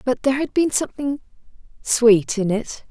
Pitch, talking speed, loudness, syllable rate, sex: 250 Hz, 165 wpm, -19 LUFS, 5.1 syllables/s, female